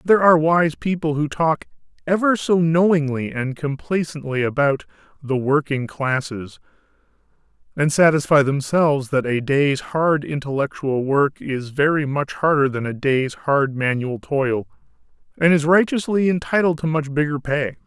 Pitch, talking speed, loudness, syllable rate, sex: 145 Hz, 140 wpm, -20 LUFS, 4.6 syllables/s, male